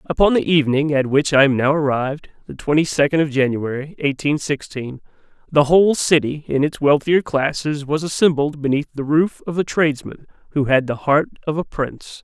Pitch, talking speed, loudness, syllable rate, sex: 145 Hz, 185 wpm, -18 LUFS, 5.4 syllables/s, male